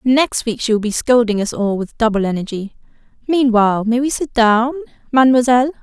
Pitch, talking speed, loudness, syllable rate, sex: 235 Hz, 175 wpm, -16 LUFS, 5.7 syllables/s, female